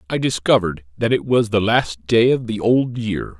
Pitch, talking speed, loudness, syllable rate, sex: 110 Hz, 210 wpm, -18 LUFS, 4.8 syllables/s, male